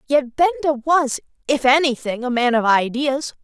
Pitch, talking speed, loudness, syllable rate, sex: 270 Hz, 155 wpm, -18 LUFS, 4.7 syllables/s, female